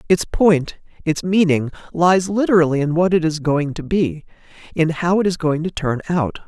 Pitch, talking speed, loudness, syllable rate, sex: 165 Hz, 195 wpm, -18 LUFS, 4.7 syllables/s, male